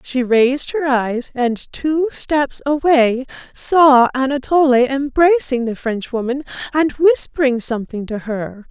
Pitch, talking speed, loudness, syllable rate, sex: 265 Hz, 125 wpm, -16 LUFS, 3.9 syllables/s, female